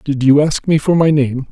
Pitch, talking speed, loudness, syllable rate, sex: 145 Hz, 280 wpm, -13 LUFS, 5.0 syllables/s, male